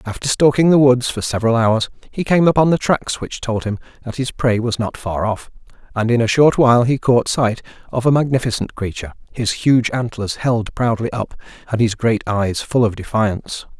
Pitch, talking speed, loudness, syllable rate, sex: 120 Hz, 205 wpm, -17 LUFS, 5.2 syllables/s, male